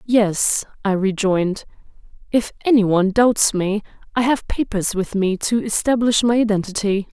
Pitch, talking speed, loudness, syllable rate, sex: 210 Hz, 140 wpm, -19 LUFS, 4.7 syllables/s, female